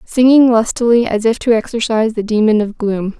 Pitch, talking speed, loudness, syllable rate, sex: 225 Hz, 190 wpm, -13 LUFS, 5.5 syllables/s, female